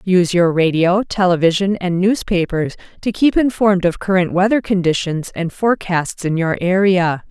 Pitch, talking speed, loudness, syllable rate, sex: 185 Hz, 150 wpm, -16 LUFS, 4.9 syllables/s, female